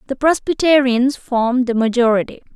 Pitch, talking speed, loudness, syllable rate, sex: 255 Hz, 115 wpm, -16 LUFS, 5.4 syllables/s, female